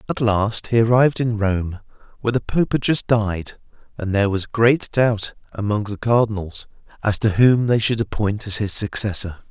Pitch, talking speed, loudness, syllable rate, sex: 110 Hz, 185 wpm, -20 LUFS, 4.9 syllables/s, male